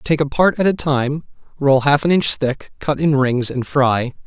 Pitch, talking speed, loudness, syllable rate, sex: 140 Hz, 225 wpm, -17 LUFS, 4.3 syllables/s, male